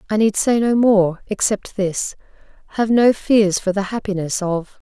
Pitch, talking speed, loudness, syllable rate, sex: 205 Hz, 170 wpm, -18 LUFS, 4.3 syllables/s, female